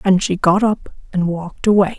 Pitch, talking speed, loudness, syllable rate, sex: 190 Hz, 210 wpm, -17 LUFS, 5.2 syllables/s, female